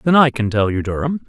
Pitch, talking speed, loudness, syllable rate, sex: 125 Hz, 280 wpm, -17 LUFS, 6.3 syllables/s, male